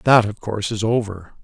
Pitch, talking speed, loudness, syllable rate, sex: 105 Hz, 210 wpm, -20 LUFS, 5.2 syllables/s, male